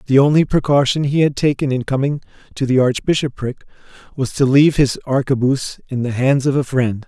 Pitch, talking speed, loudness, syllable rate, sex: 135 Hz, 185 wpm, -17 LUFS, 5.8 syllables/s, male